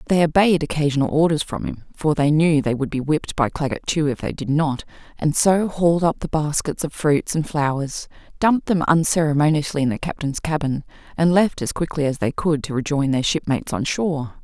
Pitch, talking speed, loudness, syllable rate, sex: 155 Hz, 210 wpm, -20 LUFS, 5.6 syllables/s, female